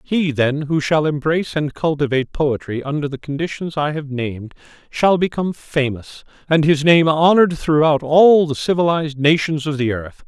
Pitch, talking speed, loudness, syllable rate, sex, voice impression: 150 Hz, 170 wpm, -17 LUFS, 5.1 syllables/s, male, masculine, adult-like, tensed, powerful, clear, fluent, intellectual, sincere, calm, wild, lively, slightly strict, light